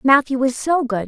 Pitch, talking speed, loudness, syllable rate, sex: 260 Hz, 220 wpm, -18 LUFS, 5.2 syllables/s, female